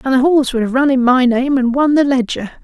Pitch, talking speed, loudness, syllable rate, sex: 260 Hz, 295 wpm, -14 LUFS, 6.2 syllables/s, female